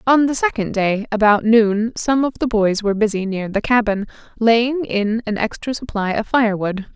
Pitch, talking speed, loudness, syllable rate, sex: 220 Hz, 190 wpm, -18 LUFS, 4.9 syllables/s, female